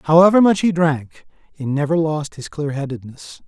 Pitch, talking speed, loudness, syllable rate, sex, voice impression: 155 Hz, 155 wpm, -18 LUFS, 5.1 syllables/s, male, masculine, adult-like, powerful, bright, fluent, raspy, sincere, calm, slightly mature, friendly, reassuring, wild, strict, slightly intense